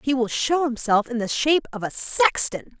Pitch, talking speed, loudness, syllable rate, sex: 250 Hz, 215 wpm, -22 LUFS, 5.0 syllables/s, female